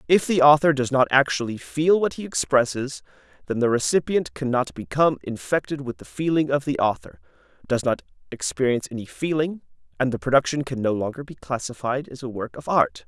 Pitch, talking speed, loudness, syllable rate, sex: 130 Hz, 190 wpm, -23 LUFS, 5.7 syllables/s, male